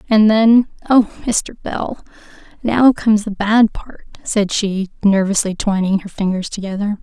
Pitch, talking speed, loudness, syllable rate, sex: 210 Hz, 135 wpm, -16 LUFS, 4.2 syllables/s, female